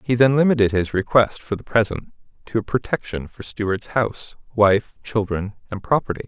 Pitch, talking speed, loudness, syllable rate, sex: 110 Hz, 170 wpm, -21 LUFS, 5.5 syllables/s, male